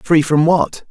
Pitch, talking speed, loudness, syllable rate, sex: 160 Hz, 200 wpm, -14 LUFS, 3.5 syllables/s, male